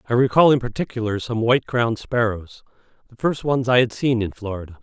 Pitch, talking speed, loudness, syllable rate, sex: 115 Hz, 200 wpm, -20 LUFS, 5.9 syllables/s, male